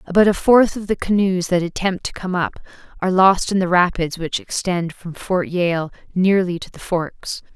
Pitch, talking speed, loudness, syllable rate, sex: 180 Hz, 200 wpm, -19 LUFS, 4.8 syllables/s, female